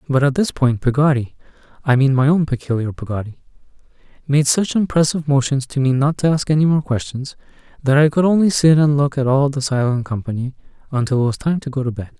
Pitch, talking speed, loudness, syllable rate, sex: 140 Hz, 200 wpm, -17 LUFS, 6.1 syllables/s, male